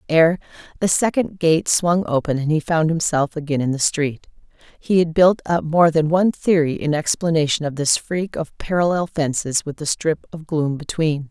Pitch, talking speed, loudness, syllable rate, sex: 160 Hz, 190 wpm, -19 LUFS, 4.8 syllables/s, female